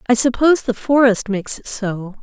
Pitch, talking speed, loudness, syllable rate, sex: 230 Hz, 190 wpm, -17 LUFS, 5.6 syllables/s, female